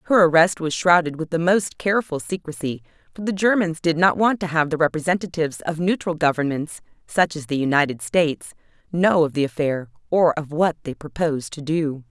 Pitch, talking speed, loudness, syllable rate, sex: 160 Hz, 190 wpm, -21 LUFS, 5.6 syllables/s, female